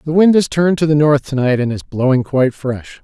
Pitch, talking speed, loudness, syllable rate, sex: 140 Hz, 275 wpm, -15 LUFS, 5.8 syllables/s, male